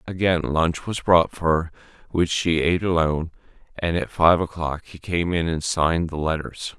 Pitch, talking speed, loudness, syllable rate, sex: 85 Hz, 185 wpm, -22 LUFS, 4.9 syllables/s, male